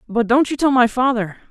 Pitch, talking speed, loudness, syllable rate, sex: 240 Hz, 240 wpm, -17 LUFS, 5.7 syllables/s, female